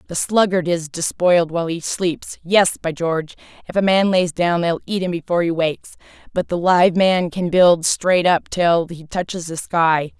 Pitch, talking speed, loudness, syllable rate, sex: 175 Hz, 190 wpm, -18 LUFS, 4.8 syllables/s, female